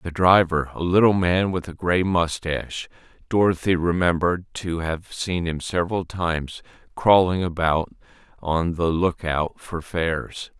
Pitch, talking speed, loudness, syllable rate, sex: 85 Hz, 140 wpm, -22 LUFS, 4.4 syllables/s, male